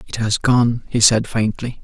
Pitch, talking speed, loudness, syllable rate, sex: 115 Hz, 195 wpm, -17 LUFS, 4.3 syllables/s, male